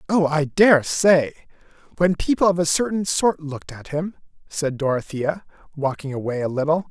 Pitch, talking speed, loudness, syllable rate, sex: 160 Hz, 165 wpm, -21 LUFS, 5.0 syllables/s, male